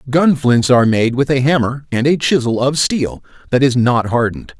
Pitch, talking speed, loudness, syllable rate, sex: 130 Hz, 210 wpm, -15 LUFS, 5.2 syllables/s, male